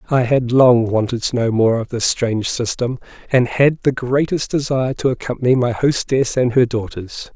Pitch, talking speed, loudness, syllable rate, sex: 125 Hz, 190 wpm, -17 LUFS, 5.0 syllables/s, male